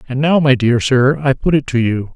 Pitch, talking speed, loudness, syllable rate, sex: 135 Hz, 280 wpm, -14 LUFS, 5.1 syllables/s, male